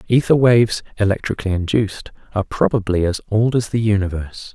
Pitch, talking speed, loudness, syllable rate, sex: 105 Hz, 145 wpm, -18 LUFS, 6.4 syllables/s, male